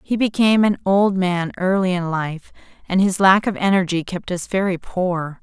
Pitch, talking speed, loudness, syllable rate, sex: 185 Hz, 190 wpm, -19 LUFS, 4.7 syllables/s, female